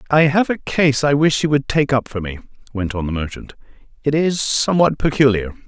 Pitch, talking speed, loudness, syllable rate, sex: 135 Hz, 210 wpm, -18 LUFS, 5.5 syllables/s, male